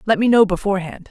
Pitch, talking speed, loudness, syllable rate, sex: 200 Hz, 220 wpm, -17 LUFS, 7.1 syllables/s, female